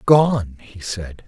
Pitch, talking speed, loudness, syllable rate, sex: 110 Hz, 140 wpm, -20 LUFS, 2.7 syllables/s, male